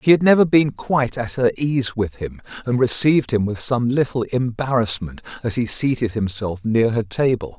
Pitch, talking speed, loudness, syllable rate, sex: 120 Hz, 190 wpm, -20 LUFS, 5.0 syllables/s, male